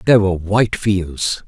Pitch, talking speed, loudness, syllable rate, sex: 95 Hz, 165 wpm, -17 LUFS, 4.9 syllables/s, male